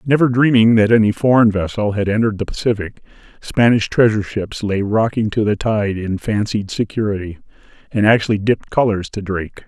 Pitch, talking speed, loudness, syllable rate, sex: 105 Hz, 165 wpm, -17 LUFS, 5.8 syllables/s, male